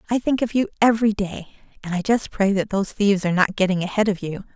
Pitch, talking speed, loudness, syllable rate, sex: 205 Hz, 250 wpm, -21 LUFS, 6.9 syllables/s, female